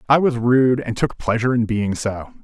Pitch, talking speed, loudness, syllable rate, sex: 120 Hz, 220 wpm, -19 LUFS, 5.1 syllables/s, male